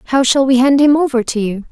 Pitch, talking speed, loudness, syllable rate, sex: 255 Hz, 280 wpm, -13 LUFS, 6.2 syllables/s, female